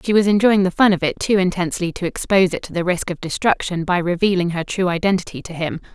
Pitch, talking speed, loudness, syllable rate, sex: 180 Hz, 240 wpm, -19 LUFS, 6.5 syllables/s, female